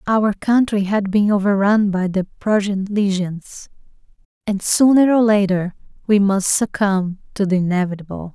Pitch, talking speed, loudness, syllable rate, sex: 200 Hz, 135 wpm, -17 LUFS, 4.6 syllables/s, female